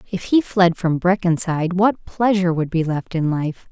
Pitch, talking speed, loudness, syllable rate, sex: 180 Hz, 195 wpm, -19 LUFS, 4.9 syllables/s, female